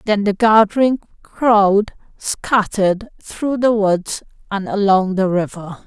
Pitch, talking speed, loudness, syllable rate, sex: 205 Hz, 125 wpm, -17 LUFS, 3.6 syllables/s, female